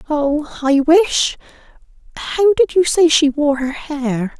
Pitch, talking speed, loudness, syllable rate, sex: 300 Hz, 135 wpm, -15 LUFS, 3.7 syllables/s, female